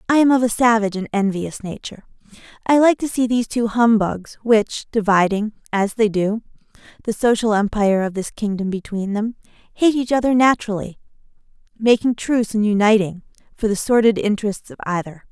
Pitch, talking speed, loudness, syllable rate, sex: 215 Hz, 160 wpm, -19 LUFS, 5.7 syllables/s, female